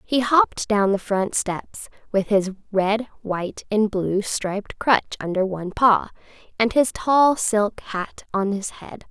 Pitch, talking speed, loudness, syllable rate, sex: 210 Hz, 165 wpm, -22 LUFS, 4.0 syllables/s, female